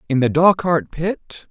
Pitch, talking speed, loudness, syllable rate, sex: 160 Hz, 160 wpm, -18 LUFS, 3.8 syllables/s, male